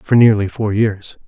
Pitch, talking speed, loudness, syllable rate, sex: 105 Hz, 190 wpm, -15 LUFS, 4.2 syllables/s, male